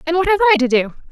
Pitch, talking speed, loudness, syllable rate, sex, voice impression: 315 Hz, 325 wpm, -15 LUFS, 7.9 syllables/s, female, feminine, slightly adult-like, tensed, cute, unique, slightly sweet, slightly lively